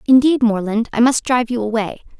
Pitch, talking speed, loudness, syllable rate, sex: 235 Hz, 190 wpm, -16 LUFS, 6.0 syllables/s, female